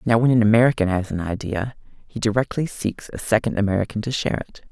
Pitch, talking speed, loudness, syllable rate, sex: 110 Hz, 205 wpm, -21 LUFS, 6.3 syllables/s, male